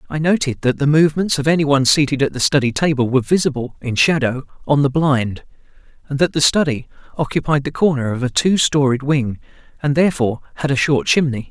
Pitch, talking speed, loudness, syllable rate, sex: 140 Hz, 195 wpm, -17 LUFS, 6.1 syllables/s, male